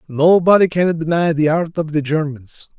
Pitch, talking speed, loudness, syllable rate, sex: 160 Hz, 170 wpm, -16 LUFS, 4.7 syllables/s, male